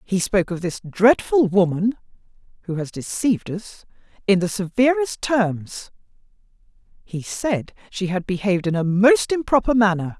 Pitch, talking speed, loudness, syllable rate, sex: 205 Hz, 140 wpm, -20 LUFS, 4.7 syllables/s, female